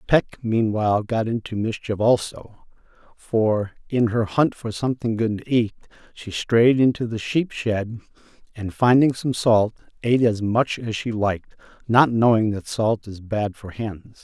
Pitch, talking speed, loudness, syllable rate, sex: 110 Hz, 165 wpm, -21 LUFS, 4.4 syllables/s, male